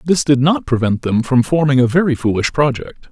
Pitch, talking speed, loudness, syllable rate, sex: 135 Hz, 210 wpm, -15 LUFS, 5.5 syllables/s, male